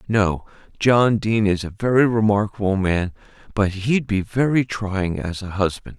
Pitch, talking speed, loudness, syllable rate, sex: 105 Hz, 160 wpm, -20 LUFS, 4.5 syllables/s, male